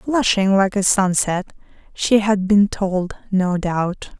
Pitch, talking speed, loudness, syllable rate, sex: 195 Hz, 130 wpm, -18 LUFS, 3.4 syllables/s, female